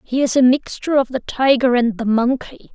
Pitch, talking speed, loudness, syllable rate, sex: 250 Hz, 220 wpm, -17 LUFS, 5.3 syllables/s, female